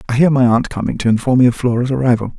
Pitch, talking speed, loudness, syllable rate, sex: 125 Hz, 275 wpm, -15 LUFS, 7.3 syllables/s, male